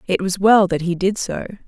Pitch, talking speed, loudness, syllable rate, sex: 190 Hz, 250 wpm, -18 LUFS, 5.3 syllables/s, female